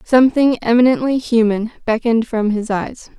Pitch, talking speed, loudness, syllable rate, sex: 235 Hz, 130 wpm, -16 LUFS, 5.2 syllables/s, female